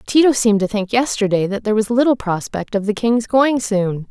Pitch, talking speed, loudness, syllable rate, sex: 220 Hz, 220 wpm, -17 LUFS, 5.5 syllables/s, female